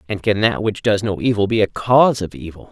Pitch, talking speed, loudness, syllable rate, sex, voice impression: 105 Hz, 265 wpm, -17 LUFS, 5.9 syllables/s, male, masculine, adult-like, slightly thick, slightly fluent, cool, slightly refreshing, sincere